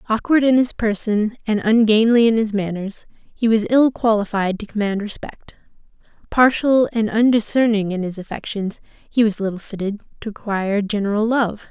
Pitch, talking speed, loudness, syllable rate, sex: 215 Hz, 155 wpm, -19 LUFS, 5.1 syllables/s, female